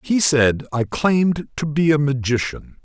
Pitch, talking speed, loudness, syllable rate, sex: 145 Hz, 170 wpm, -19 LUFS, 4.3 syllables/s, male